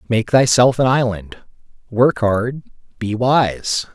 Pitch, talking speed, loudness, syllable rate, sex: 120 Hz, 120 wpm, -16 LUFS, 3.4 syllables/s, male